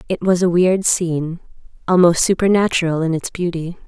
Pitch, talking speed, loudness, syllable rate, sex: 175 Hz, 155 wpm, -17 LUFS, 5.4 syllables/s, female